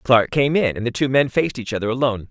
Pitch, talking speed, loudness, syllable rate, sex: 125 Hz, 285 wpm, -19 LUFS, 6.8 syllables/s, male